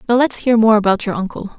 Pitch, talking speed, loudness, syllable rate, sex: 220 Hz, 265 wpm, -15 LUFS, 6.4 syllables/s, female